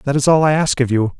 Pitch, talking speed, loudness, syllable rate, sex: 140 Hz, 350 wpm, -15 LUFS, 6.1 syllables/s, male